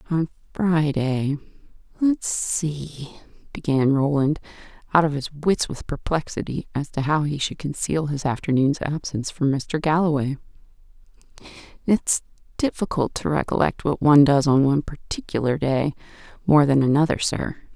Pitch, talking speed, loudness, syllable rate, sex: 150 Hz, 130 wpm, -22 LUFS, 4.9 syllables/s, female